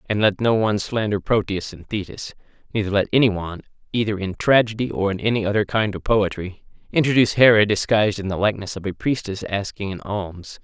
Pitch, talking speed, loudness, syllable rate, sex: 105 Hz, 190 wpm, -21 LUFS, 5.9 syllables/s, male